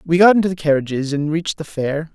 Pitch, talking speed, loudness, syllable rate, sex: 160 Hz, 250 wpm, -18 LUFS, 6.4 syllables/s, male